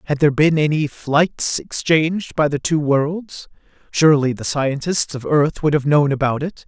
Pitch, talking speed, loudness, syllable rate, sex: 150 Hz, 180 wpm, -18 LUFS, 4.6 syllables/s, male